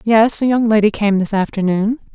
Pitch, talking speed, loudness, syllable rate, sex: 215 Hz, 195 wpm, -15 LUFS, 5.2 syllables/s, female